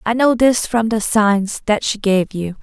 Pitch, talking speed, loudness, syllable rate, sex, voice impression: 215 Hz, 230 wpm, -16 LUFS, 4.1 syllables/s, female, feminine, adult-like, slightly clear, slightly cute, refreshing, friendly